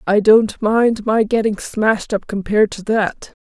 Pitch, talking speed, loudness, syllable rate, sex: 215 Hz, 175 wpm, -16 LUFS, 4.3 syllables/s, female